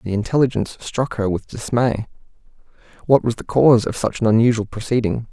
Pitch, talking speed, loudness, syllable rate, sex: 115 Hz, 170 wpm, -19 LUFS, 6.0 syllables/s, male